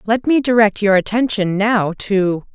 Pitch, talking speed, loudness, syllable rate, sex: 210 Hz, 165 wpm, -16 LUFS, 4.2 syllables/s, female